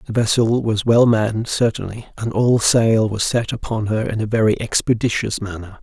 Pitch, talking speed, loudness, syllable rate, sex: 110 Hz, 185 wpm, -18 LUFS, 5.1 syllables/s, male